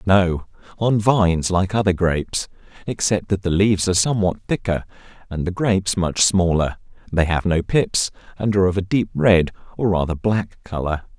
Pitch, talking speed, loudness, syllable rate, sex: 95 Hz, 170 wpm, -20 LUFS, 5.1 syllables/s, male